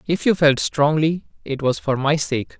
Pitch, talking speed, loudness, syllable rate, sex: 145 Hz, 210 wpm, -20 LUFS, 4.4 syllables/s, male